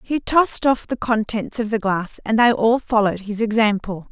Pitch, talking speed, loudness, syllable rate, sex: 220 Hz, 205 wpm, -19 LUFS, 5.1 syllables/s, female